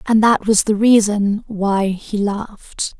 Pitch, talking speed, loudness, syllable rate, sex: 210 Hz, 160 wpm, -17 LUFS, 3.6 syllables/s, female